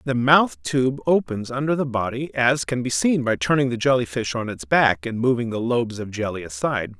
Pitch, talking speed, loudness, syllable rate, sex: 120 Hz, 225 wpm, -21 LUFS, 5.3 syllables/s, male